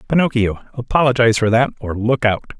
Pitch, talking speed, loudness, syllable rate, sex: 120 Hz, 160 wpm, -17 LUFS, 6.3 syllables/s, male